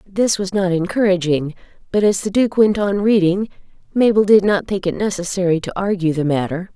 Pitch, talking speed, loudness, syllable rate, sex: 190 Hz, 185 wpm, -17 LUFS, 5.4 syllables/s, female